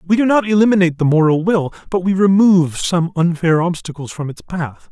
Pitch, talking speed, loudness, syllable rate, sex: 175 Hz, 195 wpm, -15 LUFS, 5.7 syllables/s, male